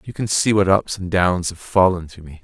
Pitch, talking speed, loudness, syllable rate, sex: 95 Hz, 270 wpm, -18 LUFS, 5.2 syllables/s, male